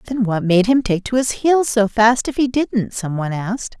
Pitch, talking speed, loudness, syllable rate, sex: 225 Hz, 255 wpm, -17 LUFS, 5.0 syllables/s, female